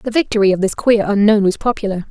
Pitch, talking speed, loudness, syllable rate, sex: 205 Hz, 230 wpm, -15 LUFS, 6.4 syllables/s, female